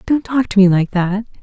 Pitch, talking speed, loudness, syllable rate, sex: 210 Hz, 250 wpm, -15 LUFS, 5.0 syllables/s, female